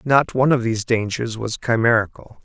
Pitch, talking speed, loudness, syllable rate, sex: 120 Hz, 170 wpm, -19 LUFS, 5.6 syllables/s, male